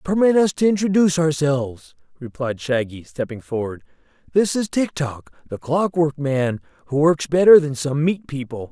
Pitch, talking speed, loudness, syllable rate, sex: 150 Hz, 150 wpm, -20 LUFS, 4.9 syllables/s, male